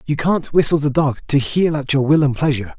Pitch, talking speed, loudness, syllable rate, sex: 145 Hz, 260 wpm, -17 LUFS, 5.8 syllables/s, male